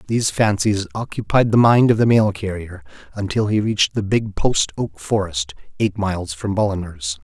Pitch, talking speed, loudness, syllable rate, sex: 100 Hz, 170 wpm, -19 LUFS, 5.1 syllables/s, male